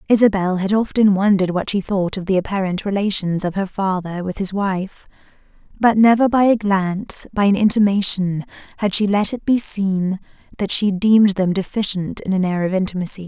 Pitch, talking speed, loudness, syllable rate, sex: 195 Hz, 185 wpm, -18 LUFS, 5.3 syllables/s, female